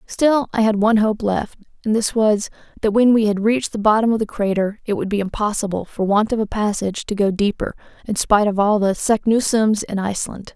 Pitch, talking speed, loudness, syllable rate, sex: 210 Hz, 220 wpm, -19 LUFS, 5.7 syllables/s, female